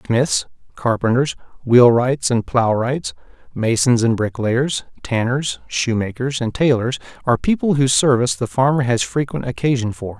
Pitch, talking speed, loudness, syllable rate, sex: 125 Hz, 130 wpm, -18 LUFS, 4.8 syllables/s, male